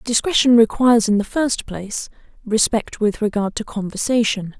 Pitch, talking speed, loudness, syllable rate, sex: 220 Hz, 145 wpm, -18 LUFS, 5.1 syllables/s, female